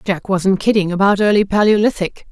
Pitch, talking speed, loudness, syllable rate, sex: 200 Hz, 155 wpm, -15 LUFS, 5.5 syllables/s, female